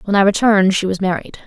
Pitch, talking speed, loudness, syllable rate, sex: 195 Hz, 245 wpm, -15 LUFS, 7.0 syllables/s, female